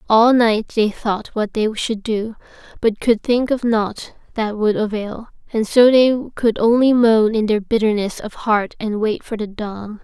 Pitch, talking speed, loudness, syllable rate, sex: 220 Hz, 190 wpm, -18 LUFS, 4.1 syllables/s, female